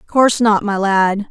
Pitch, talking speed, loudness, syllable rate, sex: 210 Hz, 185 wpm, -14 LUFS, 4.0 syllables/s, female